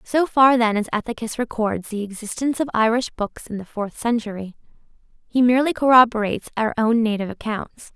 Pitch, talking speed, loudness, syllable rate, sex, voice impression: 225 Hz, 165 wpm, -20 LUFS, 5.7 syllables/s, female, feminine, young, slightly bright, fluent, cute, friendly, slightly lively, slightly kind